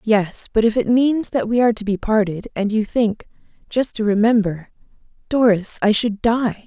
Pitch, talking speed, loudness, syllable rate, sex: 220 Hz, 170 wpm, -18 LUFS, 4.8 syllables/s, female